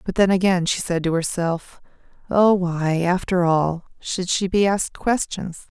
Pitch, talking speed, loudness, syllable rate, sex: 180 Hz, 165 wpm, -21 LUFS, 4.3 syllables/s, female